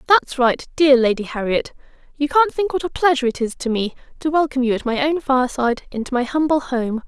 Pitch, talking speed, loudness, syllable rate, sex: 270 Hz, 220 wpm, -19 LUFS, 6.1 syllables/s, female